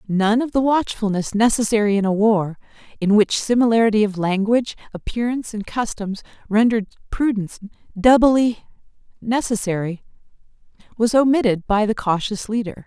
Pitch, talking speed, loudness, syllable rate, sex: 215 Hz, 120 wpm, -19 LUFS, 5.5 syllables/s, female